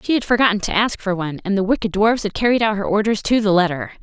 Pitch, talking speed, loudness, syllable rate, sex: 205 Hz, 285 wpm, -18 LUFS, 6.8 syllables/s, female